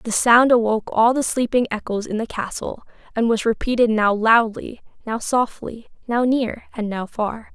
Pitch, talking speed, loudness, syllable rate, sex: 230 Hz, 175 wpm, -20 LUFS, 4.7 syllables/s, female